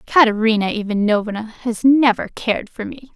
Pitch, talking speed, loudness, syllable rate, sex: 225 Hz, 135 wpm, -17 LUFS, 5.1 syllables/s, female